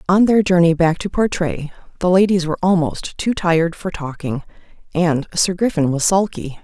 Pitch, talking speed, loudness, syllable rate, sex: 175 Hz, 170 wpm, -18 LUFS, 5.1 syllables/s, female